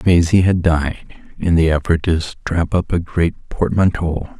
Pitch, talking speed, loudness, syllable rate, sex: 85 Hz, 165 wpm, -17 LUFS, 3.9 syllables/s, male